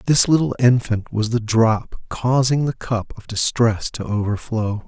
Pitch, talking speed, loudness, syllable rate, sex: 115 Hz, 160 wpm, -19 LUFS, 4.1 syllables/s, male